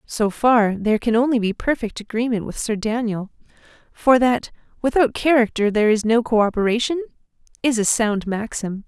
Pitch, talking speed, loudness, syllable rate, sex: 230 Hz, 155 wpm, -20 LUFS, 5.3 syllables/s, female